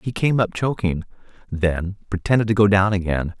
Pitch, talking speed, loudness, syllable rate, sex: 100 Hz, 175 wpm, -20 LUFS, 5.2 syllables/s, male